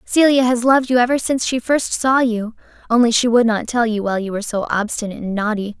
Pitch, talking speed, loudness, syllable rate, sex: 235 Hz, 240 wpm, -17 LUFS, 6.4 syllables/s, female